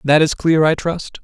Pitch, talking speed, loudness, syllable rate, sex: 155 Hz, 245 wpm, -16 LUFS, 4.4 syllables/s, male